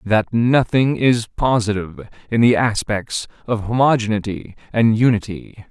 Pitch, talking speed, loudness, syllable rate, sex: 110 Hz, 115 wpm, -18 LUFS, 4.5 syllables/s, male